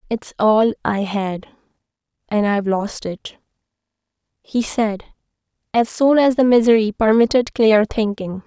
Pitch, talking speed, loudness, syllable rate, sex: 220 Hz, 130 wpm, -18 LUFS, 4.3 syllables/s, female